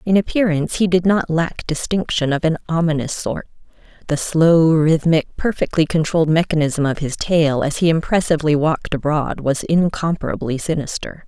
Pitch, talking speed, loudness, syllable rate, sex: 160 Hz, 150 wpm, -18 LUFS, 5.2 syllables/s, female